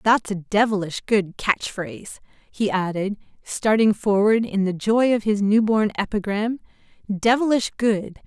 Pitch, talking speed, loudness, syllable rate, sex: 210 Hz, 140 wpm, -21 LUFS, 4.3 syllables/s, female